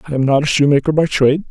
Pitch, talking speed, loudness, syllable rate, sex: 145 Hz, 280 wpm, -14 LUFS, 7.6 syllables/s, male